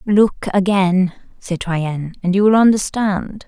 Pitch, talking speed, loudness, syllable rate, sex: 190 Hz, 120 wpm, -17 LUFS, 4.1 syllables/s, female